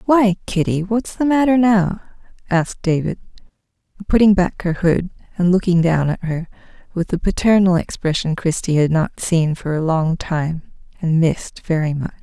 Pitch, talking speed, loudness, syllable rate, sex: 180 Hz, 160 wpm, -18 LUFS, 4.8 syllables/s, female